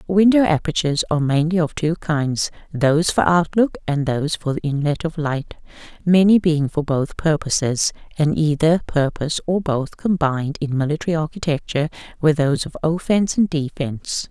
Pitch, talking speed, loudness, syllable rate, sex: 155 Hz, 150 wpm, -19 LUFS, 5.2 syllables/s, female